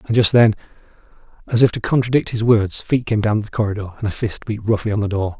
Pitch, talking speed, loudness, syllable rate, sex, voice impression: 110 Hz, 245 wpm, -18 LUFS, 6.2 syllables/s, male, masculine, adult-like, relaxed, slightly dark, slightly muffled, raspy, sincere, calm, slightly mature, slightly wild, kind, modest